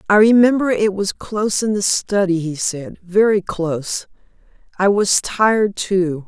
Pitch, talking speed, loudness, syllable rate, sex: 195 Hz, 145 wpm, -17 LUFS, 4.3 syllables/s, female